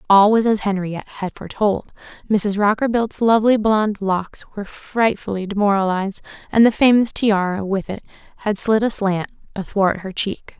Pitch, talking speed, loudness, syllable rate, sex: 205 Hz, 145 wpm, -19 LUFS, 5.1 syllables/s, female